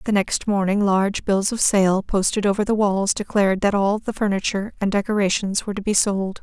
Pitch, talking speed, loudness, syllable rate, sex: 200 Hz, 205 wpm, -20 LUFS, 5.6 syllables/s, female